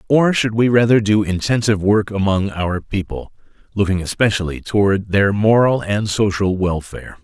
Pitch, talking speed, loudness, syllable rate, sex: 105 Hz, 150 wpm, -17 LUFS, 5.0 syllables/s, male